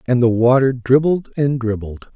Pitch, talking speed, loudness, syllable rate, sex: 125 Hz, 165 wpm, -16 LUFS, 4.5 syllables/s, male